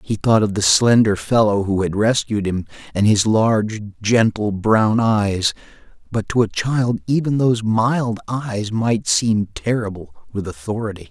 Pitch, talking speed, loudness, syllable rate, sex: 110 Hz, 155 wpm, -18 LUFS, 4.2 syllables/s, male